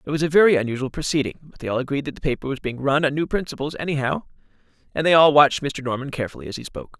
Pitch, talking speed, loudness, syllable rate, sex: 140 Hz, 260 wpm, -21 LUFS, 7.6 syllables/s, male